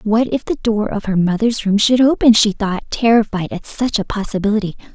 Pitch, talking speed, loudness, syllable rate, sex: 215 Hz, 205 wpm, -16 LUFS, 5.5 syllables/s, female